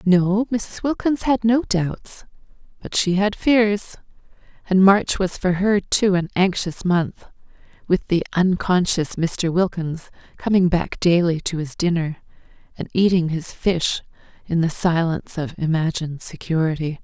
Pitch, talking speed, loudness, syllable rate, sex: 180 Hz, 140 wpm, -20 LUFS, 4.2 syllables/s, female